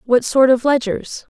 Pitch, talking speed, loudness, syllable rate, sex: 250 Hz, 175 wpm, -16 LUFS, 4.0 syllables/s, female